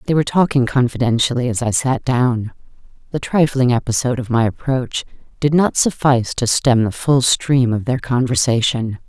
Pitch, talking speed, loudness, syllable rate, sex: 125 Hz, 165 wpm, -17 LUFS, 5.2 syllables/s, female